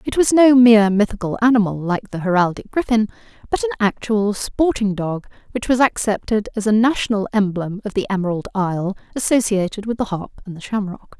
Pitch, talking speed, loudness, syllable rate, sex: 210 Hz, 175 wpm, -18 LUFS, 5.6 syllables/s, female